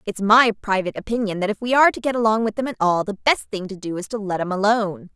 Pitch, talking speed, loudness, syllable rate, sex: 210 Hz, 290 wpm, -20 LUFS, 6.9 syllables/s, female